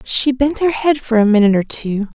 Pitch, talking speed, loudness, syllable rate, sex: 245 Hz, 245 wpm, -15 LUFS, 5.5 syllables/s, female